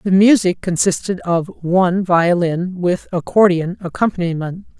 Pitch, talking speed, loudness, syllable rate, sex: 180 Hz, 115 wpm, -16 LUFS, 4.5 syllables/s, female